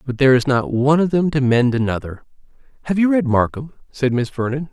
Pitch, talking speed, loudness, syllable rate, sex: 135 Hz, 205 wpm, -18 LUFS, 6.3 syllables/s, male